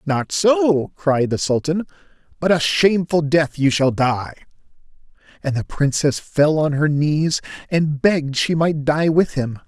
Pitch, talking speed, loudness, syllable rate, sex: 150 Hz, 160 wpm, -18 LUFS, 4.1 syllables/s, male